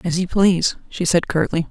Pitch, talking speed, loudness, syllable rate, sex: 175 Hz, 210 wpm, -19 LUFS, 5.4 syllables/s, female